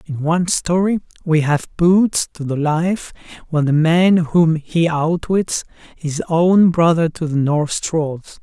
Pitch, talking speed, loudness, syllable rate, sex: 165 Hz, 155 wpm, -17 LUFS, 3.9 syllables/s, male